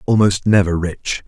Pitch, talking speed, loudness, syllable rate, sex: 95 Hz, 140 wpm, -16 LUFS, 4.6 syllables/s, male